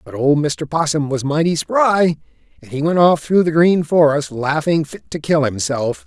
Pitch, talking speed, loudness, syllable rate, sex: 150 Hz, 200 wpm, -16 LUFS, 4.2 syllables/s, male